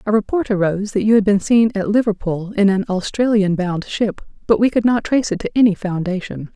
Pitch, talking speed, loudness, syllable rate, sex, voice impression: 205 Hz, 220 wpm, -17 LUFS, 5.7 syllables/s, female, feminine, slightly gender-neutral, adult-like, slightly middle-aged, very relaxed, very weak, slightly dark, soft, slightly muffled, very fluent, raspy, cute